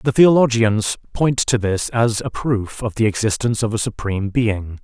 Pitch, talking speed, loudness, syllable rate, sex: 110 Hz, 185 wpm, -18 LUFS, 4.9 syllables/s, male